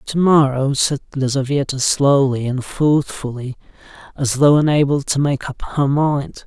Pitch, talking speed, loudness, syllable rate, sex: 140 Hz, 140 wpm, -17 LUFS, 4.3 syllables/s, male